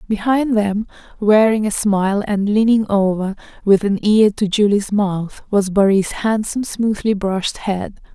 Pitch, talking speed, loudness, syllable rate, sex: 205 Hz, 145 wpm, -17 LUFS, 4.4 syllables/s, female